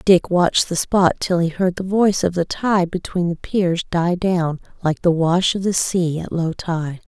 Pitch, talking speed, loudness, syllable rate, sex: 175 Hz, 220 wpm, -19 LUFS, 4.4 syllables/s, female